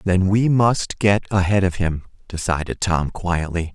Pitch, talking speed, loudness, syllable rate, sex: 95 Hz, 160 wpm, -20 LUFS, 4.2 syllables/s, male